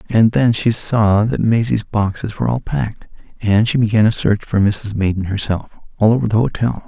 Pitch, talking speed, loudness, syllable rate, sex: 110 Hz, 190 wpm, -17 LUFS, 5.2 syllables/s, male